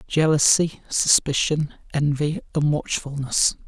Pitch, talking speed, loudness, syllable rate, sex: 145 Hz, 80 wpm, -21 LUFS, 3.9 syllables/s, male